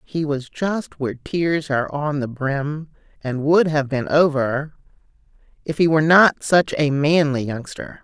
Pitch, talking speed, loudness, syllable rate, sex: 150 Hz, 165 wpm, -19 LUFS, 4.2 syllables/s, female